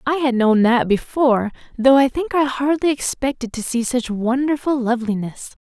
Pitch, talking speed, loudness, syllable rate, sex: 255 Hz, 170 wpm, -18 LUFS, 5.0 syllables/s, female